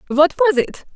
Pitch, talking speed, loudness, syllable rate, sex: 325 Hz, 190 wpm, -16 LUFS, 7.0 syllables/s, female